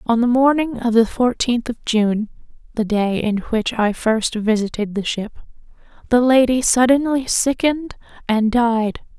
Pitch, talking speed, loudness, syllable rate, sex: 235 Hz, 150 wpm, -18 LUFS, 3.3 syllables/s, female